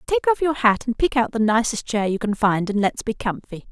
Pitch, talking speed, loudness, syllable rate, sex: 230 Hz, 275 wpm, -21 LUFS, 5.6 syllables/s, female